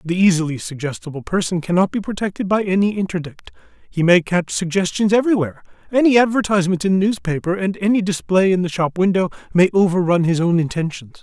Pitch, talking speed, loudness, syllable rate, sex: 185 Hz, 170 wpm, -18 LUFS, 6.4 syllables/s, male